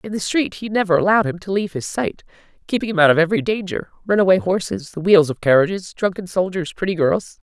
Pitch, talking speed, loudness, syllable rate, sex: 185 Hz, 210 wpm, -19 LUFS, 6.3 syllables/s, female